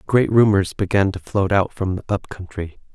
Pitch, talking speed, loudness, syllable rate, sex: 100 Hz, 205 wpm, -19 LUFS, 4.9 syllables/s, male